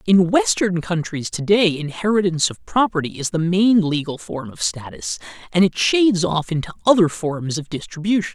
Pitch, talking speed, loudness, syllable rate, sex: 175 Hz, 175 wpm, -19 LUFS, 5.1 syllables/s, male